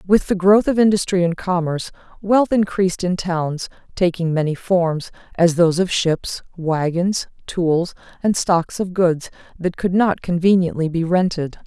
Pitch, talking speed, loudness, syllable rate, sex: 180 Hz, 155 wpm, -19 LUFS, 4.5 syllables/s, female